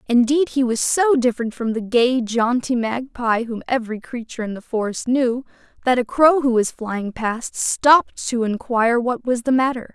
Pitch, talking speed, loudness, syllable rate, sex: 245 Hz, 185 wpm, -20 LUFS, 4.9 syllables/s, female